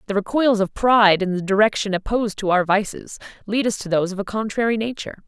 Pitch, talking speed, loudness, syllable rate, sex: 205 Hz, 215 wpm, -20 LUFS, 6.4 syllables/s, female